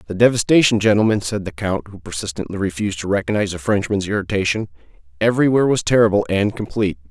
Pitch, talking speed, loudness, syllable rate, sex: 100 Hz, 160 wpm, -18 LUFS, 7.1 syllables/s, male